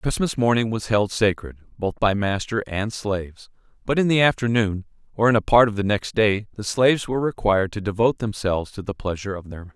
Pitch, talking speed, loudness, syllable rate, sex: 105 Hz, 215 wpm, -22 LUFS, 6.0 syllables/s, male